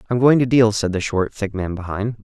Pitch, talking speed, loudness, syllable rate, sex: 110 Hz, 265 wpm, -19 LUFS, 5.4 syllables/s, male